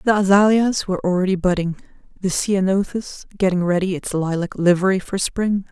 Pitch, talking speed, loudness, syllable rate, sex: 190 Hz, 145 wpm, -19 LUFS, 5.4 syllables/s, female